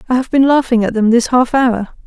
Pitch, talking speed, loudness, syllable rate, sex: 245 Hz, 260 wpm, -13 LUFS, 5.8 syllables/s, female